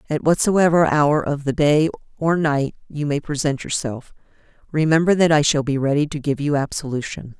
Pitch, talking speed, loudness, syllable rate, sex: 150 Hz, 180 wpm, -19 LUFS, 5.1 syllables/s, female